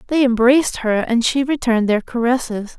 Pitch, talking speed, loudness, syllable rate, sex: 245 Hz, 175 wpm, -17 LUFS, 5.8 syllables/s, female